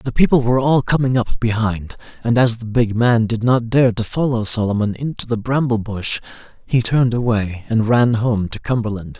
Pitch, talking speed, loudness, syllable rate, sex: 115 Hz, 195 wpm, -18 LUFS, 5.1 syllables/s, male